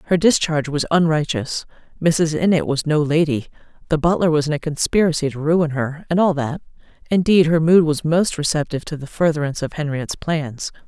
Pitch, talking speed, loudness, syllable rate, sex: 155 Hz, 175 wpm, -19 LUFS, 5.6 syllables/s, female